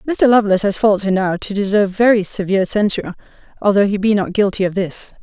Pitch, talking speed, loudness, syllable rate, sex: 200 Hz, 195 wpm, -16 LUFS, 6.7 syllables/s, female